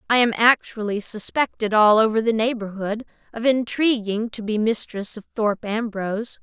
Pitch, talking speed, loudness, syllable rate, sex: 220 Hz, 150 wpm, -21 LUFS, 4.9 syllables/s, female